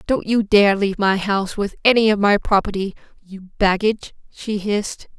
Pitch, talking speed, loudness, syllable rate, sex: 205 Hz, 175 wpm, -18 LUFS, 5.2 syllables/s, female